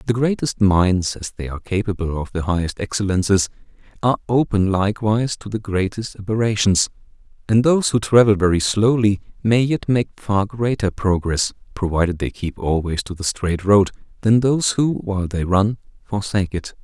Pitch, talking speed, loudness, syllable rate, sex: 100 Hz, 165 wpm, -19 LUFS, 5.3 syllables/s, male